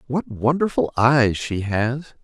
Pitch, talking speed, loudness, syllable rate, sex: 125 Hz, 135 wpm, -20 LUFS, 3.5 syllables/s, male